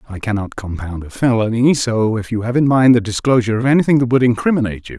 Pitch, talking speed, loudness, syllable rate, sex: 115 Hz, 240 wpm, -16 LUFS, 6.7 syllables/s, male